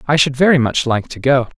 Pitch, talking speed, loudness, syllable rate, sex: 135 Hz, 265 wpm, -15 LUFS, 5.9 syllables/s, male